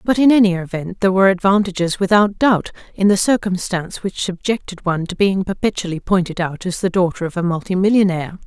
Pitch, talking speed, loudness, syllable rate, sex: 190 Hz, 175 wpm, -17 LUFS, 6.2 syllables/s, female